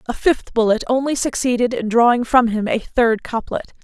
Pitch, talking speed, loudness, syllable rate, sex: 235 Hz, 190 wpm, -18 LUFS, 5.0 syllables/s, female